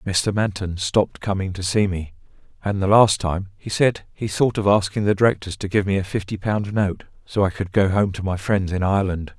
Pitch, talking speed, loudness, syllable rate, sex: 100 Hz, 230 wpm, -21 LUFS, 5.3 syllables/s, male